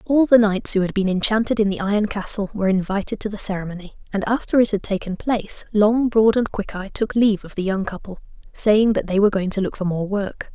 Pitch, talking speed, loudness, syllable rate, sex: 205 Hz, 240 wpm, -20 LUFS, 6.0 syllables/s, female